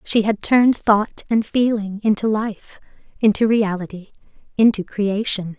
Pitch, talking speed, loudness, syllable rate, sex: 210 Hz, 130 wpm, -19 LUFS, 4.4 syllables/s, female